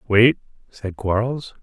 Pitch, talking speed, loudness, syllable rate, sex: 110 Hz, 110 wpm, -20 LUFS, 3.9 syllables/s, male